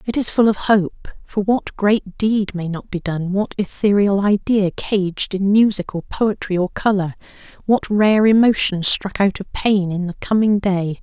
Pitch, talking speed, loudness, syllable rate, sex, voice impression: 200 Hz, 185 wpm, -18 LUFS, 4.2 syllables/s, female, very feminine, slightly old, thin, slightly tensed, slightly weak, bright, hard, muffled, fluent, slightly raspy, slightly cool, intellectual, very refreshing, very sincere, calm, friendly, reassuring, very unique, very elegant, slightly wild, sweet, slightly lively, kind, slightly intense, sharp, slightly modest, slightly light